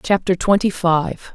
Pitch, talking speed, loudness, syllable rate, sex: 185 Hz, 135 wpm, -18 LUFS, 4.0 syllables/s, female